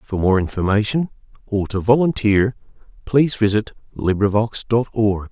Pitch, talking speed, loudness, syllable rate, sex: 110 Hz, 125 wpm, -19 LUFS, 4.9 syllables/s, male